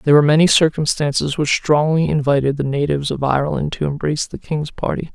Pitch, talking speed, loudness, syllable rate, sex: 145 Hz, 185 wpm, -17 LUFS, 6.3 syllables/s, male